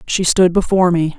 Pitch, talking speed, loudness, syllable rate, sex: 175 Hz, 205 wpm, -14 LUFS, 5.7 syllables/s, female